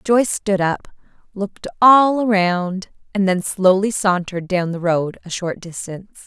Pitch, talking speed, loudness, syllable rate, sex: 190 Hz, 155 wpm, -18 LUFS, 4.5 syllables/s, female